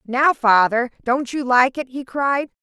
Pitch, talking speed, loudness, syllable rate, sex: 260 Hz, 185 wpm, -18 LUFS, 4.0 syllables/s, female